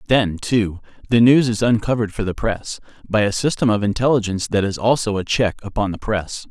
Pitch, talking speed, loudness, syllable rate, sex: 110 Hz, 205 wpm, -19 LUFS, 5.6 syllables/s, male